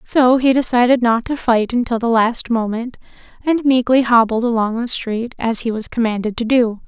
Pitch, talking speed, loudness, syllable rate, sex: 235 Hz, 190 wpm, -16 LUFS, 5.0 syllables/s, female